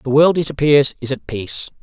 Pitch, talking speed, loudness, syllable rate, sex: 135 Hz, 230 wpm, -17 LUFS, 5.6 syllables/s, male